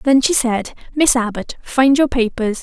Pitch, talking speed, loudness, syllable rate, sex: 245 Hz, 185 wpm, -16 LUFS, 4.3 syllables/s, female